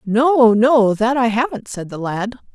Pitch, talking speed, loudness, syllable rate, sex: 230 Hz, 190 wpm, -16 LUFS, 4.0 syllables/s, female